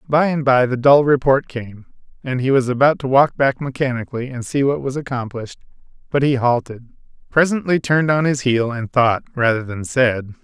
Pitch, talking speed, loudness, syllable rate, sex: 130 Hz, 190 wpm, -18 LUFS, 5.4 syllables/s, male